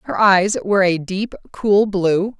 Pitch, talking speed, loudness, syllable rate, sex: 195 Hz, 175 wpm, -17 LUFS, 4.0 syllables/s, female